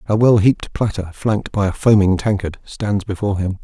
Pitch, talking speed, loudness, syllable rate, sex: 100 Hz, 200 wpm, -17 LUFS, 5.7 syllables/s, male